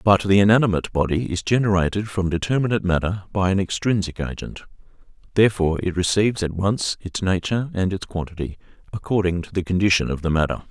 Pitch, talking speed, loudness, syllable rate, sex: 95 Hz, 170 wpm, -21 LUFS, 6.5 syllables/s, male